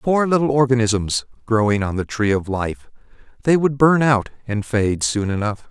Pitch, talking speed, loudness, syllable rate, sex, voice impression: 120 Hz, 170 wpm, -19 LUFS, 4.7 syllables/s, male, masculine, adult-like, intellectual, elegant, slightly sweet, kind